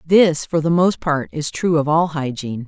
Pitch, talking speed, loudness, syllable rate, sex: 155 Hz, 225 wpm, -18 LUFS, 4.7 syllables/s, female